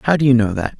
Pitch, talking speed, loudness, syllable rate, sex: 125 Hz, 375 wpm, -15 LUFS, 6.7 syllables/s, male